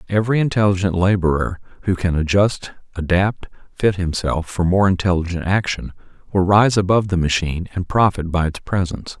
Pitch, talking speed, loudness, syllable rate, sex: 95 Hz, 150 wpm, -19 LUFS, 5.6 syllables/s, male